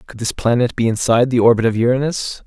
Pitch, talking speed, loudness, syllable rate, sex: 120 Hz, 220 wpm, -16 LUFS, 6.4 syllables/s, male